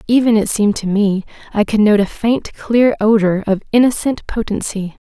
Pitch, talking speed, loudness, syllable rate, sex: 215 Hz, 175 wpm, -15 LUFS, 5.2 syllables/s, female